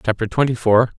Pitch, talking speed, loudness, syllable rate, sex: 115 Hz, 180 wpm, -18 LUFS, 6.0 syllables/s, male